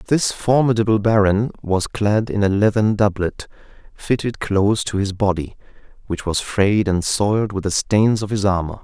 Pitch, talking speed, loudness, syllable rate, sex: 105 Hz, 170 wpm, -19 LUFS, 4.8 syllables/s, male